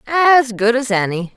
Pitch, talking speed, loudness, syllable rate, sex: 240 Hz, 175 wpm, -15 LUFS, 4.1 syllables/s, female